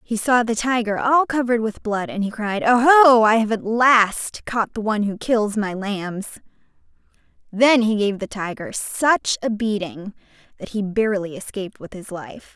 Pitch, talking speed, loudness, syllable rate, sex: 215 Hz, 185 wpm, -19 LUFS, 4.7 syllables/s, female